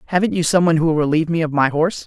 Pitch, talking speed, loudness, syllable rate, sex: 160 Hz, 320 wpm, -17 LUFS, 8.7 syllables/s, male